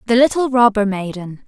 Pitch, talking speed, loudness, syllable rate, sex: 225 Hz, 160 wpm, -15 LUFS, 5.4 syllables/s, female